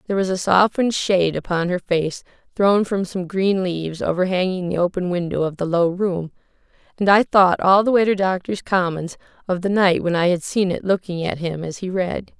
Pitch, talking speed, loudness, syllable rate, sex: 185 Hz, 215 wpm, -20 LUFS, 5.3 syllables/s, female